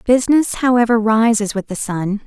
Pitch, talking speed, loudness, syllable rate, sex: 225 Hz, 160 wpm, -16 LUFS, 5.2 syllables/s, female